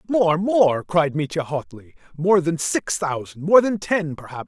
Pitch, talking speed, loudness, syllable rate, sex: 165 Hz, 175 wpm, -20 LUFS, 4.2 syllables/s, male